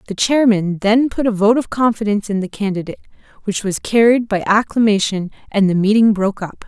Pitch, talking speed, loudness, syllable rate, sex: 210 Hz, 190 wpm, -16 LUFS, 5.9 syllables/s, female